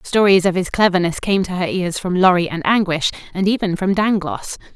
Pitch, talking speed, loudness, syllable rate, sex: 185 Hz, 200 wpm, -17 LUFS, 5.5 syllables/s, female